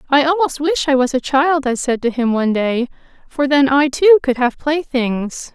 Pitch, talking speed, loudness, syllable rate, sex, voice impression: 275 Hz, 215 wpm, -16 LUFS, 4.8 syllables/s, female, feminine, slightly adult-like, slightly muffled, slightly intellectual, slightly calm, friendly, slightly sweet